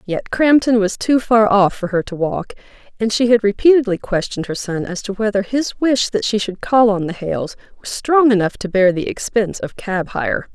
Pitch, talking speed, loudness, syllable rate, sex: 210 Hz, 220 wpm, -17 LUFS, 5.1 syllables/s, female